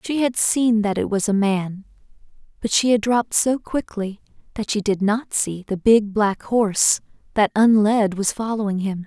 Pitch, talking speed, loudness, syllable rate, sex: 210 Hz, 185 wpm, -20 LUFS, 4.6 syllables/s, female